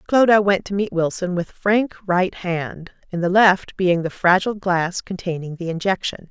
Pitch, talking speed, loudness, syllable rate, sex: 185 Hz, 180 wpm, -20 LUFS, 4.5 syllables/s, female